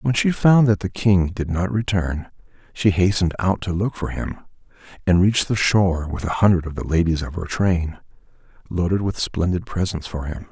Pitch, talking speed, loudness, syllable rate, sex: 90 Hz, 200 wpm, -21 LUFS, 5.2 syllables/s, male